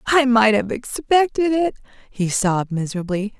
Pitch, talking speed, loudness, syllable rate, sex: 235 Hz, 140 wpm, -19 LUFS, 4.7 syllables/s, female